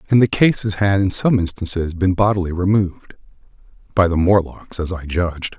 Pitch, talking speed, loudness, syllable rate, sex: 95 Hz, 160 wpm, -18 LUFS, 5.4 syllables/s, male